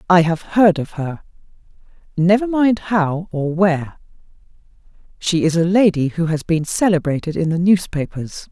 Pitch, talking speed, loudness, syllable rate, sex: 175 Hz, 140 wpm, -18 LUFS, 4.7 syllables/s, female